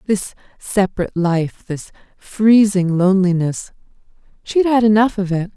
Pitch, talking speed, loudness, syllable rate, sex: 195 Hz, 130 wpm, -16 LUFS, 4.8 syllables/s, female